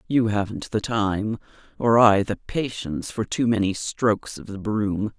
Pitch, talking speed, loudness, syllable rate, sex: 110 Hz, 175 wpm, -23 LUFS, 4.4 syllables/s, female